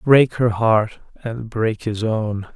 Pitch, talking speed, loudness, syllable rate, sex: 110 Hz, 165 wpm, -20 LUFS, 3.1 syllables/s, male